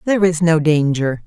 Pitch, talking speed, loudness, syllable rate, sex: 165 Hz, 190 wpm, -16 LUFS, 5.4 syllables/s, female